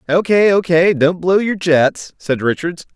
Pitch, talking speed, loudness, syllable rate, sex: 175 Hz, 160 wpm, -15 LUFS, 3.4 syllables/s, male